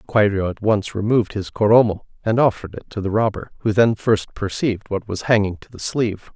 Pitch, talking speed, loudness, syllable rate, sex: 105 Hz, 210 wpm, -20 LUFS, 5.8 syllables/s, male